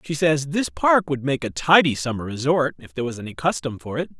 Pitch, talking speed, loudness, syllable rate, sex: 140 Hz, 245 wpm, -21 LUFS, 5.8 syllables/s, male